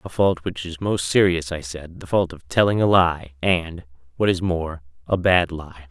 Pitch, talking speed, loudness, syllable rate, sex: 85 Hz, 215 wpm, -21 LUFS, 4.6 syllables/s, male